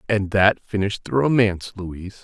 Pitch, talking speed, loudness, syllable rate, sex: 105 Hz, 160 wpm, -20 LUFS, 5.5 syllables/s, male